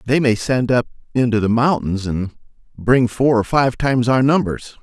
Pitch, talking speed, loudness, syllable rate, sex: 120 Hz, 185 wpm, -17 LUFS, 4.8 syllables/s, male